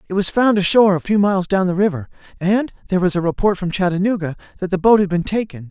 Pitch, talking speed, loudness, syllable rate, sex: 190 Hz, 240 wpm, -17 LUFS, 6.9 syllables/s, male